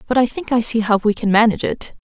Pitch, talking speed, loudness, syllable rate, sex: 225 Hz, 295 wpm, -17 LUFS, 6.6 syllables/s, female